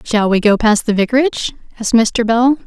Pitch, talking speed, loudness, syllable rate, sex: 230 Hz, 205 wpm, -14 LUFS, 5.8 syllables/s, female